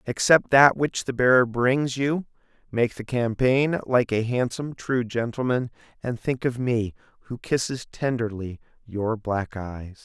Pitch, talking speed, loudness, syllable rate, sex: 120 Hz, 150 wpm, -24 LUFS, 4.2 syllables/s, male